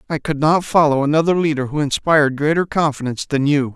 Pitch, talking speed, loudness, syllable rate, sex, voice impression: 150 Hz, 190 wpm, -17 LUFS, 6.3 syllables/s, male, masculine, adult-like, tensed, bright, slightly soft, clear, cool, intellectual, calm, friendly, wild, slightly lively, slightly kind, modest